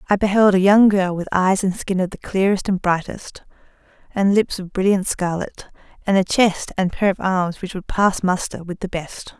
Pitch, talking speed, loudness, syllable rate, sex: 190 Hz, 210 wpm, -19 LUFS, 4.8 syllables/s, female